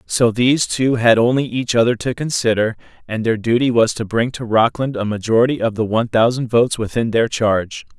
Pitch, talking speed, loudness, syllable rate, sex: 115 Hz, 205 wpm, -17 LUFS, 5.6 syllables/s, male